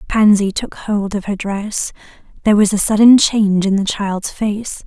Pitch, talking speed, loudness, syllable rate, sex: 205 Hz, 185 wpm, -15 LUFS, 4.6 syllables/s, female